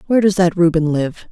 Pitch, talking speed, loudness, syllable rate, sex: 175 Hz, 230 wpm, -15 LUFS, 6.1 syllables/s, female